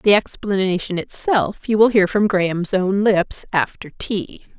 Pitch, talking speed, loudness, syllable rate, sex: 195 Hz, 145 wpm, -19 LUFS, 4.1 syllables/s, female